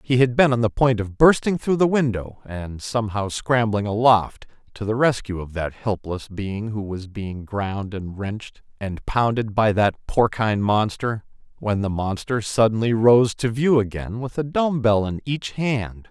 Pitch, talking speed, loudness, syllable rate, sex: 110 Hz, 185 wpm, -21 LUFS, 4.4 syllables/s, male